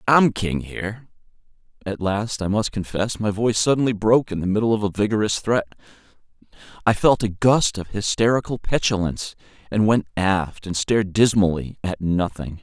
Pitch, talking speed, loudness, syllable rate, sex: 105 Hz, 160 wpm, -21 LUFS, 5.3 syllables/s, male